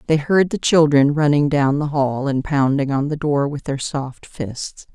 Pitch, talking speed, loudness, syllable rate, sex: 145 Hz, 205 wpm, -18 LUFS, 4.2 syllables/s, female